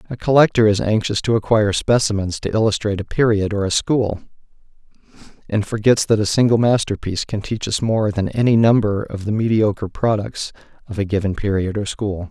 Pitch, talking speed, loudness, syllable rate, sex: 105 Hz, 180 wpm, -18 LUFS, 5.7 syllables/s, male